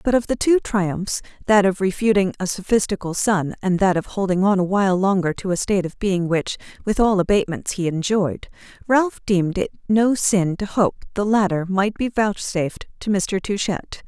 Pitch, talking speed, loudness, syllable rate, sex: 195 Hz, 190 wpm, -20 LUFS, 5.1 syllables/s, female